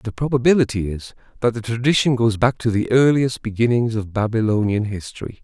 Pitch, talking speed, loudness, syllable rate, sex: 115 Hz, 165 wpm, -19 LUFS, 5.7 syllables/s, male